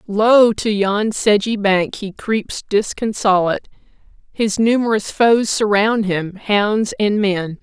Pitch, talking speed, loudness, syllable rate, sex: 210 Hz, 125 wpm, -17 LUFS, 3.6 syllables/s, female